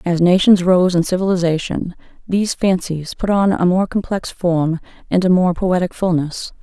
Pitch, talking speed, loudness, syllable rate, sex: 180 Hz, 165 wpm, -17 LUFS, 4.8 syllables/s, female